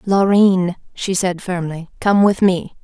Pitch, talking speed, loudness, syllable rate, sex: 185 Hz, 150 wpm, -17 LUFS, 3.6 syllables/s, female